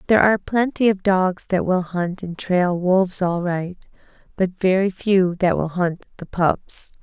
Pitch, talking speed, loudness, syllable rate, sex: 185 Hz, 180 wpm, -20 LUFS, 4.3 syllables/s, female